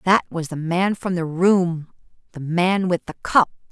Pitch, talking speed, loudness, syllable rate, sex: 175 Hz, 180 wpm, -20 LUFS, 4.1 syllables/s, female